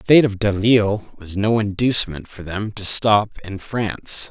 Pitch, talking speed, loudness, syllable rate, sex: 105 Hz, 180 wpm, -19 LUFS, 4.7 syllables/s, male